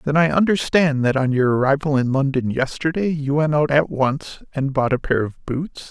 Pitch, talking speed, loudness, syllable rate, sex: 140 Hz, 215 wpm, -19 LUFS, 4.9 syllables/s, male